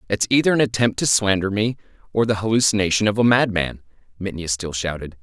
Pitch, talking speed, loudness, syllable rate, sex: 105 Hz, 185 wpm, -20 LUFS, 6.1 syllables/s, male